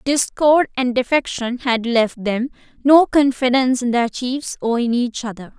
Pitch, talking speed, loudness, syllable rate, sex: 250 Hz, 160 wpm, -18 LUFS, 4.4 syllables/s, female